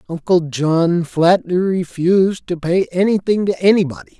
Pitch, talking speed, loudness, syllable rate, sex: 175 Hz, 130 wpm, -16 LUFS, 4.5 syllables/s, male